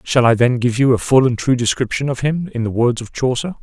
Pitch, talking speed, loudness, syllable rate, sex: 125 Hz, 280 wpm, -17 LUFS, 5.7 syllables/s, male